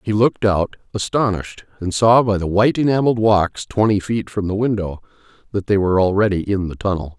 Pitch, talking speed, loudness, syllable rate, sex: 100 Hz, 190 wpm, -18 LUFS, 5.9 syllables/s, male